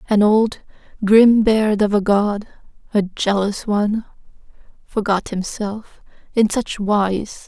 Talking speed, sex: 120 wpm, female